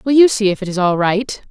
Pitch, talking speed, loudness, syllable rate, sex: 210 Hz, 320 wpm, -15 LUFS, 6.0 syllables/s, female